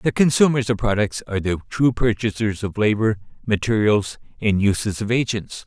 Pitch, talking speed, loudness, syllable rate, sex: 110 Hz, 160 wpm, -20 LUFS, 5.2 syllables/s, male